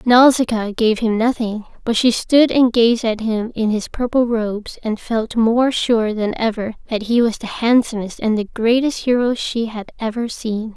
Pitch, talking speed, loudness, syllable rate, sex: 230 Hz, 190 wpm, -18 LUFS, 4.4 syllables/s, female